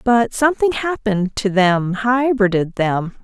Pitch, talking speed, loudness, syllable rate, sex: 220 Hz, 130 wpm, -17 LUFS, 4.3 syllables/s, female